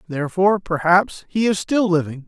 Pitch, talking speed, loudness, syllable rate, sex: 180 Hz, 160 wpm, -19 LUFS, 5.3 syllables/s, male